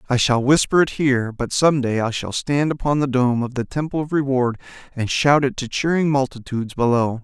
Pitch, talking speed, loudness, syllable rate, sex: 130 Hz, 215 wpm, -20 LUFS, 5.5 syllables/s, male